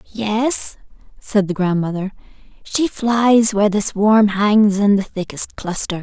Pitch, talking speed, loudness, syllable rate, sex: 205 Hz, 140 wpm, -17 LUFS, 3.8 syllables/s, female